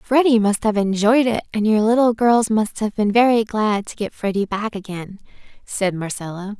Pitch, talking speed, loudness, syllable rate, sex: 215 Hz, 190 wpm, -19 LUFS, 4.8 syllables/s, female